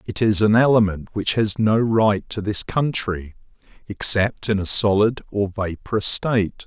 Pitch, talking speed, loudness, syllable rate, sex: 105 Hz, 160 wpm, -19 LUFS, 4.4 syllables/s, male